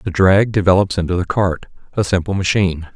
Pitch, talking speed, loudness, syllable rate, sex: 95 Hz, 185 wpm, -16 LUFS, 5.8 syllables/s, male